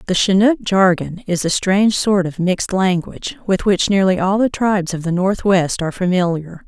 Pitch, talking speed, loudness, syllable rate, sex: 185 Hz, 190 wpm, -17 LUFS, 5.2 syllables/s, female